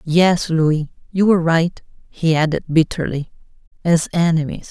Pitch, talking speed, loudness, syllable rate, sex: 165 Hz, 115 wpm, -18 LUFS, 4.5 syllables/s, female